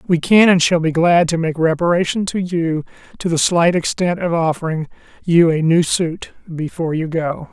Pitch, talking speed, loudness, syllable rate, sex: 165 Hz, 190 wpm, -16 LUFS, 4.9 syllables/s, male